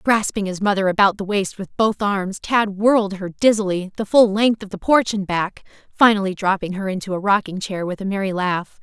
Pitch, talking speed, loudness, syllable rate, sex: 200 Hz, 215 wpm, -19 LUFS, 5.2 syllables/s, female